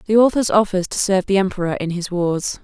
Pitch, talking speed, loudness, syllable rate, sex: 190 Hz, 225 wpm, -18 LUFS, 6.1 syllables/s, female